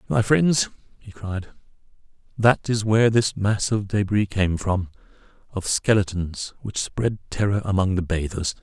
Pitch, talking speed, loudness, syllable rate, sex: 100 Hz, 130 wpm, -22 LUFS, 4.3 syllables/s, male